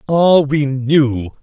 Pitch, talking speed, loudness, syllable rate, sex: 140 Hz, 125 wpm, -14 LUFS, 2.5 syllables/s, male